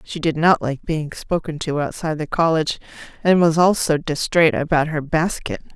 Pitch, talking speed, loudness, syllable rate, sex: 160 Hz, 175 wpm, -19 LUFS, 5.1 syllables/s, female